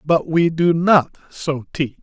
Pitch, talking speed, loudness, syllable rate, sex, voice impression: 155 Hz, 180 wpm, -18 LUFS, 3.5 syllables/s, male, very masculine, old, muffled, intellectual, slightly mature, wild, slightly lively